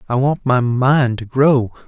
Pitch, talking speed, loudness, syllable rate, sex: 130 Hz, 190 wpm, -16 LUFS, 3.9 syllables/s, male